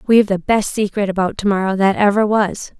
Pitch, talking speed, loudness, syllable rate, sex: 200 Hz, 215 wpm, -16 LUFS, 5.7 syllables/s, female